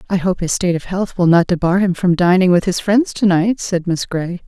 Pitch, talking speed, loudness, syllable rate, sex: 180 Hz, 270 wpm, -16 LUFS, 5.4 syllables/s, female